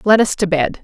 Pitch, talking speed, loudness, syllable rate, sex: 190 Hz, 290 wpm, -15 LUFS, 5.7 syllables/s, female